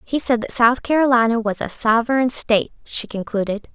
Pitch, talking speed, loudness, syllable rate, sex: 230 Hz, 175 wpm, -19 LUFS, 5.4 syllables/s, female